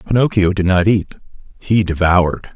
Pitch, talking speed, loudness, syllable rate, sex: 95 Hz, 140 wpm, -15 LUFS, 5.3 syllables/s, male